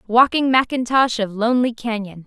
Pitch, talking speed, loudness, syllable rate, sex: 235 Hz, 135 wpm, -18 LUFS, 5.2 syllables/s, female